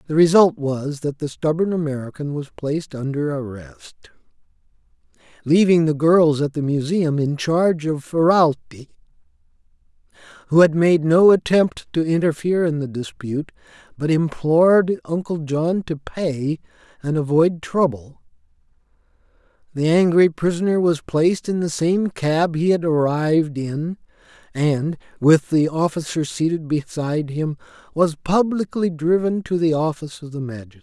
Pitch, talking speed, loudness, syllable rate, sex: 155 Hz, 135 wpm, -19 LUFS, 4.8 syllables/s, male